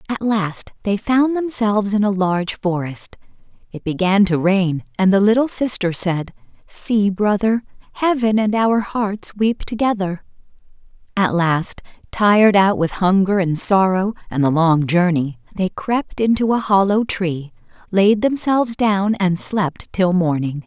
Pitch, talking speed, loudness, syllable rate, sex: 195 Hz, 150 wpm, -18 LUFS, 4.2 syllables/s, female